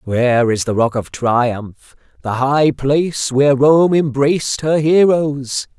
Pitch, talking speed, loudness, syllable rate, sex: 135 Hz, 145 wpm, -15 LUFS, 3.8 syllables/s, male